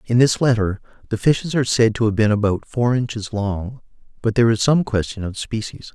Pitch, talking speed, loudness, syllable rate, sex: 115 Hz, 210 wpm, -19 LUFS, 5.6 syllables/s, male